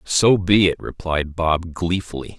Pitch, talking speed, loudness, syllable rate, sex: 85 Hz, 150 wpm, -19 LUFS, 3.9 syllables/s, male